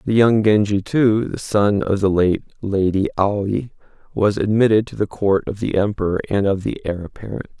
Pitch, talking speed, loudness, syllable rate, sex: 100 Hz, 190 wpm, -19 LUFS, 5.1 syllables/s, male